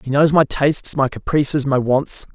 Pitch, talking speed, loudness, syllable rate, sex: 140 Hz, 205 wpm, -17 LUFS, 5.0 syllables/s, male